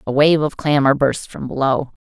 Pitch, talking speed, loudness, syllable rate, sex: 140 Hz, 205 wpm, -17 LUFS, 5.0 syllables/s, female